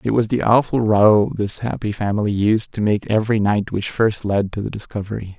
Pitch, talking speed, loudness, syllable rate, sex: 105 Hz, 210 wpm, -19 LUFS, 5.3 syllables/s, male